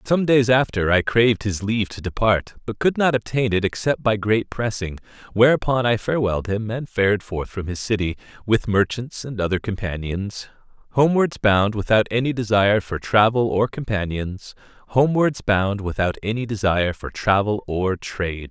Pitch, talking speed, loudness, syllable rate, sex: 105 Hz, 165 wpm, -21 LUFS, 5.1 syllables/s, male